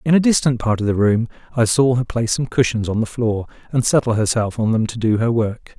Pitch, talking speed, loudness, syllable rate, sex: 115 Hz, 260 wpm, -18 LUFS, 5.8 syllables/s, male